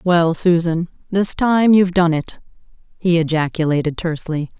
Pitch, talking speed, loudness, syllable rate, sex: 170 Hz, 130 wpm, -17 LUFS, 4.9 syllables/s, female